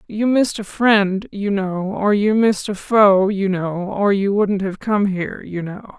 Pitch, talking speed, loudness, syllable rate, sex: 200 Hz, 210 wpm, -18 LUFS, 4.2 syllables/s, female